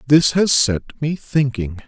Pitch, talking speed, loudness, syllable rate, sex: 135 Hz, 160 wpm, -18 LUFS, 4.1 syllables/s, male